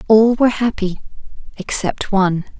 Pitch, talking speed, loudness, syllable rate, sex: 210 Hz, 115 wpm, -17 LUFS, 5.0 syllables/s, female